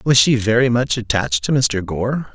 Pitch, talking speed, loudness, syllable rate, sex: 115 Hz, 205 wpm, -17 LUFS, 4.9 syllables/s, male